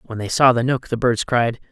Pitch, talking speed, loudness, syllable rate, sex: 120 Hz, 280 wpm, -18 LUFS, 5.0 syllables/s, male